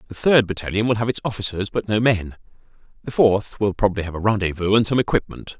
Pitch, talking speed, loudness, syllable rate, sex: 105 Hz, 215 wpm, -20 LUFS, 6.4 syllables/s, male